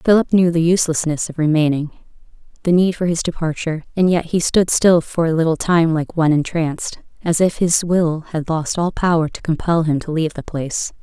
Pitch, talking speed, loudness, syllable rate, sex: 165 Hz, 205 wpm, -18 LUFS, 5.7 syllables/s, female